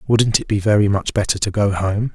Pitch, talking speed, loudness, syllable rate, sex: 105 Hz, 250 wpm, -18 LUFS, 5.5 syllables/s, male